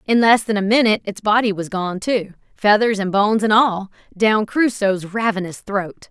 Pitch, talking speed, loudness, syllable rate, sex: 210 Hz, 165 wpm, -18 LUFS, 4.9 syllables/s, female